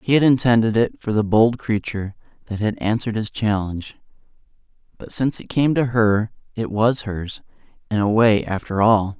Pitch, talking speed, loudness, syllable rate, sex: 110 Hz, 175 wpm, -20 LUFS, 5.2 syllables/s, male